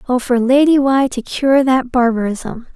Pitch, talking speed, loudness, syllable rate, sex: 255 Hz, 175 wpm, -14 LUFS, 4.4 syllables/s, female